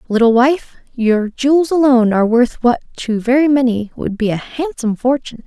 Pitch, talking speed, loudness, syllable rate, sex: 245 Hz, 175 wpm, -15 LUFS, 5.4 syllables/s, female